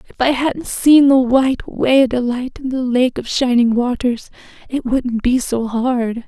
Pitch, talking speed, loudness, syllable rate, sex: 250 Hz, 190 wpm, -16 LUFS, 4.3 syllables/s, female